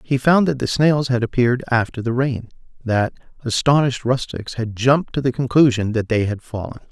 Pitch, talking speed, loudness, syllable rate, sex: 125 Hz, 190 wpm, -19 LUFS, 5.5 syllables/s, male